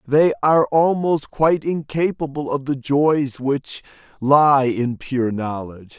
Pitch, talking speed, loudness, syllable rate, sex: 140 Hz, 130 wpm, -19 LUFS, 3.9 syllables/s, male